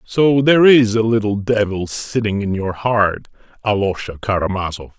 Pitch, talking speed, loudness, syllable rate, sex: 105 Hz, 145 wpm, -17 LUFS, 4.8 syllables/s, male